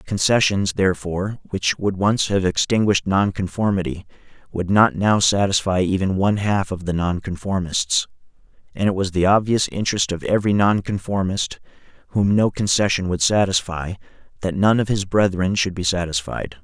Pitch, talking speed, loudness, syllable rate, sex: 95 Hz, 145 wpm, -20 LUFS, 5.2 syllables/s, male